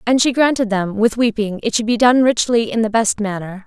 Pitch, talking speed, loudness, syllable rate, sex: 225 Hz, 245 wpm, -16 LUFS, 5.4 syllables/s, female